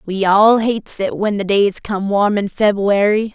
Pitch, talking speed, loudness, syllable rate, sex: 205 Hz, 195 wpm, -15 LUFS, 4.4 syllables/s, female